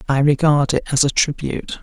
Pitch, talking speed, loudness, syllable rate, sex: 140 Hz, 195 wpm, -17 LUFS, 5.8 syllables/s, male